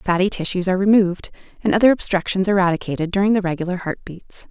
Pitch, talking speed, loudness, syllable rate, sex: 190 Hz, 175 wpm, -19 LUFS, 6.8 syllables/s, female